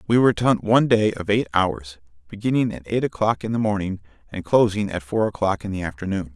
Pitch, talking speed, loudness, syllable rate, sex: 100 Hz, 225 wpm, -21 LUFS, 6.2 syllables/s, male